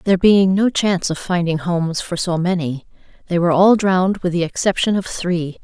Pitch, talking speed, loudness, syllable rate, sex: 180 Hz, 200 wpm, -17 LUFS, 5.6 syllables/s, female